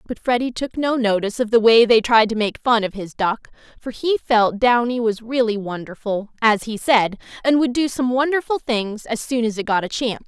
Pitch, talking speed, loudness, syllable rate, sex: 230 Hz, 230 wpm, -19 LUFS, 5.3 syllables/s, female